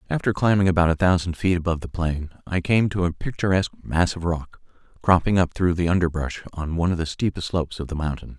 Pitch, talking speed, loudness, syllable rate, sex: 85 Hz, 220 wpm, -23 LUFS, 6.3 syllables/s, male